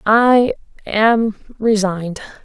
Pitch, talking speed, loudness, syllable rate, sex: 215 Hz, 75 wpm, -16 LUFS, 3.2 syllables/s, female